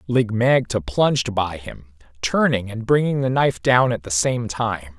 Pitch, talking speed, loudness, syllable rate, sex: 115 Hz, 180 wpm, -20 LUFS, 4.4 syllables/s, male